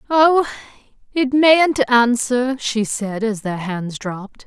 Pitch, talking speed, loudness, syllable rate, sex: 245 Hz, 135 wpm, -18 LUFS, 3.3 syllables/s, female